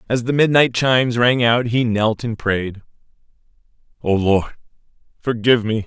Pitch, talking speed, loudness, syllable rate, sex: 115 Hz, 145 wpm, -17 LUFS, 4.8 syllables/s, male